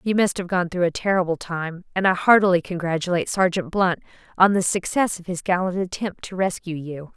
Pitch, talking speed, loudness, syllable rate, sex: 180 Hz, 200 wpm, -22 LUFS, 5.6 syllables/s, female